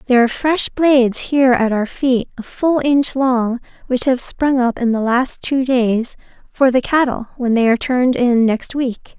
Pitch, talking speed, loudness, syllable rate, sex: 250 Hz, 200 wpm, -16 LUFS, 4.6 syllables/s, female